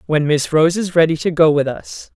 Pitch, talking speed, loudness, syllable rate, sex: 160 Hz, 245 wpm, -16 LUFS, 5.0 syllables/s, female